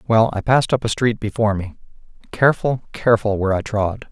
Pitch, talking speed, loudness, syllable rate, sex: 110 Hz, 190 wpm, -19 LUFS, 6.4 syllables/s, male